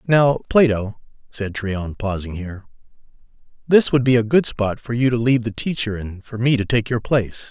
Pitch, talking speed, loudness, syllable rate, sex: 115 Hz, 200 wpm, -19 LUFS, 5.1 syllables/s, male